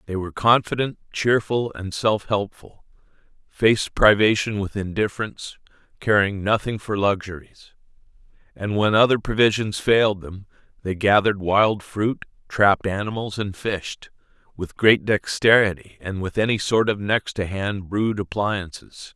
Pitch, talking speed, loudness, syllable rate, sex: 105 Hz, 130 wpm, -21 LUFS, 4.6 syllables/s, male